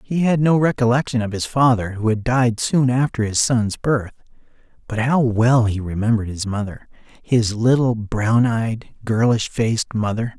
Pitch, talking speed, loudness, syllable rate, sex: 115 Hz, 165 wpm, -19 LUFS, 4.6 syllables/s, male